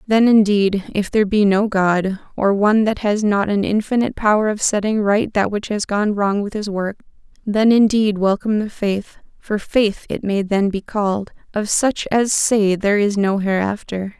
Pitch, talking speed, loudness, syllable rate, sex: 205 Hz, 195 wpm, -18 LUFS, 4.7 syllables/s, female